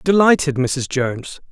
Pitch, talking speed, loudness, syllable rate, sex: 145 Hz, 120 wpm, -17 LUFS, 4.4 syllables/s, male